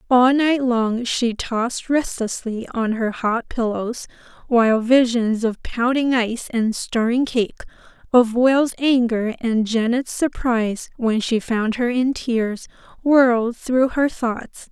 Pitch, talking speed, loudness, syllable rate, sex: 240 Hz, 140 wpm, -20 LUFS, 3.7 syllables/s, female